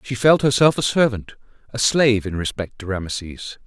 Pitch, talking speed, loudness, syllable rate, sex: 115 Hz, 180 wpm, -19 LUFS, 5.3 syllables/s, male